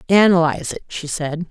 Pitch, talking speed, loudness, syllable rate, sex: 170 Hz, 160 wpm, -18 LUFS, 5.6 syllables/s, female